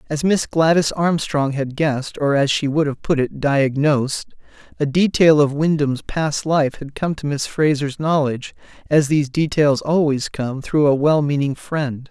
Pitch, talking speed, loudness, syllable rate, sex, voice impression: 145 Hz, 180 wpm, -19 LUFS, 3.9 syllables/s, male, masculine, adult-like, slightly tensed, slightly powerful, soft, clear, cool, intellectual, calm, friendly, lively, kind